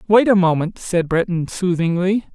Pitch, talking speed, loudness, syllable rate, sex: 180 Hz, 155 wpm, -18 LUFS, 4.7 syllables/s, male